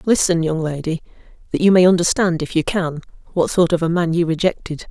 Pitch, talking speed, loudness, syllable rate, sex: 170 Hz, 210 wpm, -18 LUFS, 5.8 syllables/s, female